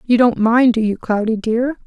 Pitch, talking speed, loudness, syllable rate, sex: 230 Hz, 225 wpm, -16 LUFS, 4.7 syllables/s, female